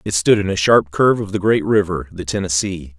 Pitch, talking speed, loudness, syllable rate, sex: 95 Hz, 240 wpm, -17 LUFS, 5.6 syllables/s, male